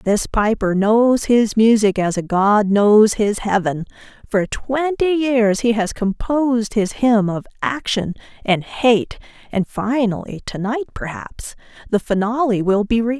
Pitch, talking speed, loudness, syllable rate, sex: 220 Hz, 145 wpm, -18 LUFS, 4.0 syllables/s, female